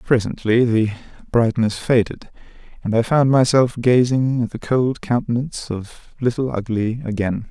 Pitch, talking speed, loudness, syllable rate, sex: 120 Hz, 135 wpm, -19 LUFS, 4.7 syllables/s, male